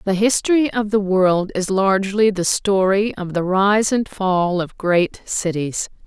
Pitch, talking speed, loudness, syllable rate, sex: 195 Hz, 170 wpm, -18 LUFS, 4.0 syllables/s, female